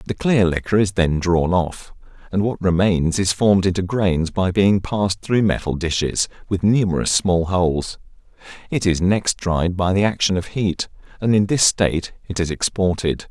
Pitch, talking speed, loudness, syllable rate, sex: 95 Hz, 180 wpm, -19 LUFS, 4.7 syllables/s, male